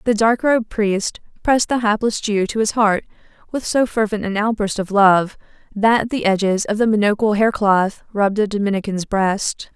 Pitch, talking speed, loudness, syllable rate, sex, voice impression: 210 Hz, 180 wpm, -18 LUFS, 4.9 syllables/s, female, feminine, adult-like, tensed, slightly powerful, bright, slightly hard, clear, intellectual, calm, slightly friendly, reassuring, elegant, slightly lively, slightly sharp